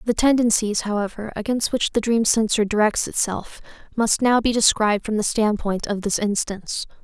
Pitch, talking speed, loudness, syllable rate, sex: 215 Hz, 170 wpm, -21 LUFS, 5.2 syllables/s, female